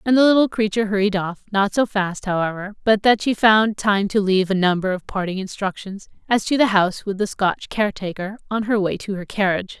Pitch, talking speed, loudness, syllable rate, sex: 200 Hz, 220 wpm, -20 LUFS, 5.8 syllables/s, female